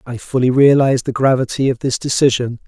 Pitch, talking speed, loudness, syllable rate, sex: 125 Hz, 180 wpm, -15 LUFS, 6.0 syllables/s, male